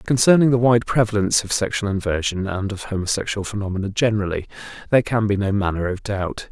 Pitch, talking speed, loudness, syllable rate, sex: 105 Hz, 175 wpm, -20 LUFS, 6.3 syllables/s, male